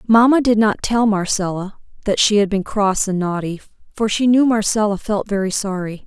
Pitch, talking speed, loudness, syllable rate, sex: 205 Hz, 190 wpm, -17 LUFS, 5.1 syllables/s, female